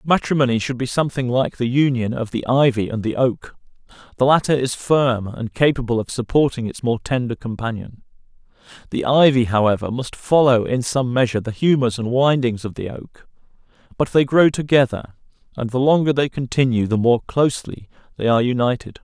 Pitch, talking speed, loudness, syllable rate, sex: 125 Hz, 175 wpm, -19 LUFS, 5.5 syllables/s, male